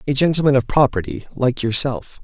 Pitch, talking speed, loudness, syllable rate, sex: 125 Hz, 160 wpm, -18 LUFS, 5.5 syllables/s, male